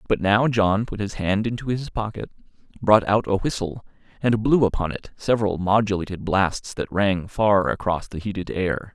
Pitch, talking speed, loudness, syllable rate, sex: 105 Hz, 180 wpm, -22 LUFS, 4.8 syllables/s, male